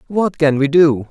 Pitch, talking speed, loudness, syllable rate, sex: 155 Hz, 215 wpm, -14 LUFS, 4.4 syllables/s, male